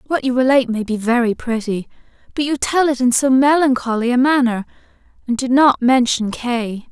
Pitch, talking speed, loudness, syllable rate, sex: 250 Hz, 180 wpm, -16 LUFS, 5.2 syllables/s, female